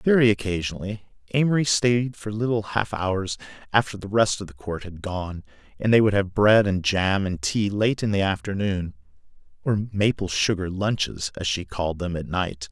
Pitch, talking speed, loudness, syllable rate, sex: 100 Hz, 185 wpm, -24 LUFS, 4.9 syllables/s, male